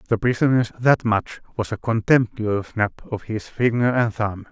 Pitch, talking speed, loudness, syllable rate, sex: 115 Hz, 175 wpm, -21 LUFS, 4.4 syllables/s, male